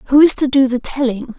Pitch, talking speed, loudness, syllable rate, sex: 260 Hz, 260 wpm, -14 LUFS, 5.2 syllables/s, female